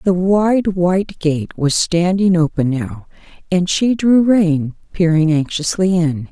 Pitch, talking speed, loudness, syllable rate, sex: 175 Hz, 145 wpm, -16 LUFS, 3.7 syllables/s, female